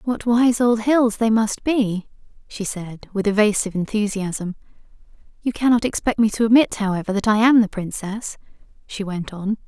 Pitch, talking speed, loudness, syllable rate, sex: 215 Hz, 165 wpm, -20 LUFS, 4.9 syllables/s, female